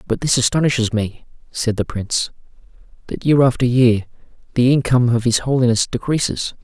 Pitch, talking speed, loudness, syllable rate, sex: 125 Hz, 155 wpm, -17 LUFS, 5.7 syllables/s, male